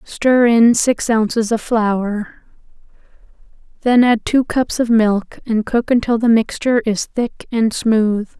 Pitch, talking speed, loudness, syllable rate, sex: 225 Hz, 150 wpm, -16 LUFS, 3.7 syllables/s, female